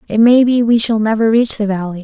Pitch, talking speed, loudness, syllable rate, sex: 220 Hz, 265 wpm, -13 LUFS, 5.9 syllables/s, female